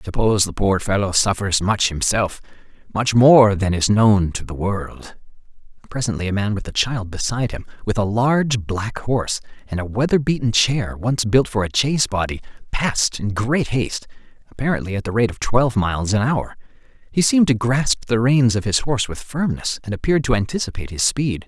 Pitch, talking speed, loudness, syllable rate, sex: 115 Hz, 195 wpm, -19 LUFS, 5.5 syllables/s, male